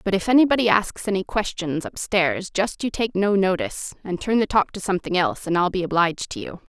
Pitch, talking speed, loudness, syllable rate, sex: 195 Hz, 220 wpm, -22 LUFS, 5.9 syllables/s, female